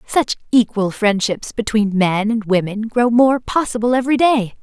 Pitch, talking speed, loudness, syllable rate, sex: 225 Hz, 155 wpm, -17 LUFS, 4.6 syllables/s, female